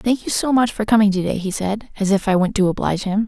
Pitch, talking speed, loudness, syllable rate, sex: 205 Hz, 275 wpm, -19 LUFS, 6.4 syllables/s, female